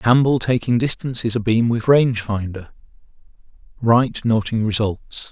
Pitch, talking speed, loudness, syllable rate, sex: 115 Hz, 115 wpm, -19 LUFS, 4.5 syllables/s, male